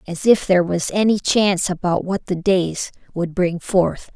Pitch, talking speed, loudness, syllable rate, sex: 185 Hz, 190 wpm, -19 LUFS, 4.5 syllables/s, female